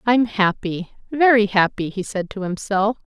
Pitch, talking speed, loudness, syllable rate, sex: 205 Hz, 155 wpm, -19 LUFS, 4.5 syllables/s, female